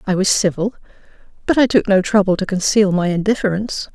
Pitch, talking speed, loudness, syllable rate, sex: 200 Hz, 180 wpm, -16 LUFS, 6.2 syllables/s, female